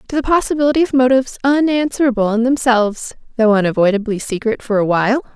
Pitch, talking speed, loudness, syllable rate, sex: 240 Hz, 155 wpm, -15 LUFS, 6.5 syllables/s, female